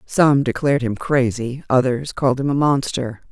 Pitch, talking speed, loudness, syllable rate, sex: 130 Hz, 165 wpm, -19 LUFS, 4.9 syllables/s, female